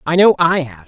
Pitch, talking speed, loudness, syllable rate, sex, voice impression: 175 Hz, 275 wpm, -14 LUFS, 5.6 syllables/s, female, feminine, very adult-like, slightly intellectual, slightly calm, slightly elegant